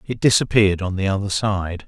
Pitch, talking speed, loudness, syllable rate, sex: 100 Hz, 190 wpm, -19 LUFS, 5.7 syllables/s, male